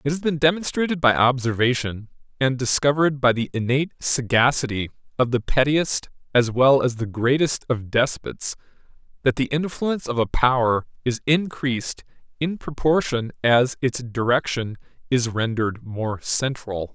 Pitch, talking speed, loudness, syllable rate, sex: 130 Hz, 140 wpm, -22 LUFS, 4.8 syllables/s, male